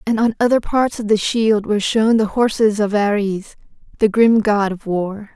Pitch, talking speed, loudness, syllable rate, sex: 215 Hz, 200 wpm, -17 LUFS, 4.8 syllables/s, female